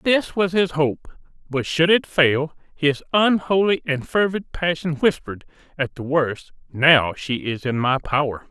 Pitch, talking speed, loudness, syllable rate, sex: 155 Hz, 160 wpm, -20 LUFS, 4.4 syllables/s, male